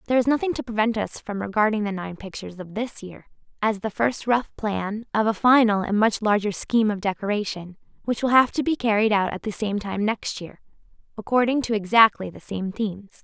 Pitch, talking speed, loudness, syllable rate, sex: 215 Hz, 215 wpm, -23 LUFS, 5.6 syllables/s, female